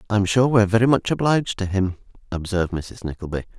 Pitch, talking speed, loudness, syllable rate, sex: 105 Hz, 220 wpm, -21 LUFS, 7.2 syllables/s, male